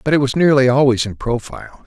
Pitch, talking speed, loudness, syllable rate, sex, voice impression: 130 Hz, 225 wpm, -15 LUFS, 6.2 syllables/s, male, masculine, middle-aged, slightly powerful, clear, slightly halting, raspy, slightly calm, mature, friendly, wild, slightly lively, slightly intense